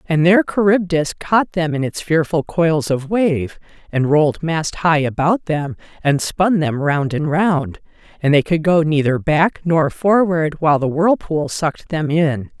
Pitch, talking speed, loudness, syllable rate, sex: 160 Hz, 175 wpm, -17 LUFS, 4.3 syllables/s, female